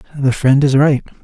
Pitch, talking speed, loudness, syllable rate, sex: 140 Hz, 195 wpm, -13 LUFS, 5.8 syllables/s, male